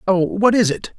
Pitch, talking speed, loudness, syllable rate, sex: 195 Hz, 245 wpm, -17 LUFS, 4.9 syllables/s, male